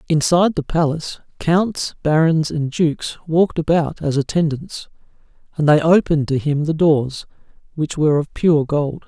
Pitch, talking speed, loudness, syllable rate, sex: 155 Hz, 150 wpm, -18 LUFS, 4.9 syllables/s, male